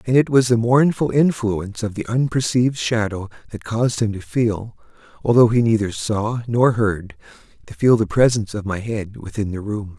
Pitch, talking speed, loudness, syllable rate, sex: 110 Hz, 175 wpm, -19 LUFS, 5.1 syllables/s, male